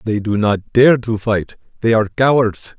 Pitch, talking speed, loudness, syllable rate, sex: 110 Hz, 195 wpm, -16 LUFS, 4.6 syllables/s, male